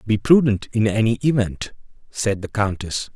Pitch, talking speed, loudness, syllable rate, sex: 110 Hz, 150 wpm, -20 LUFS, 4.6 syllables/s, male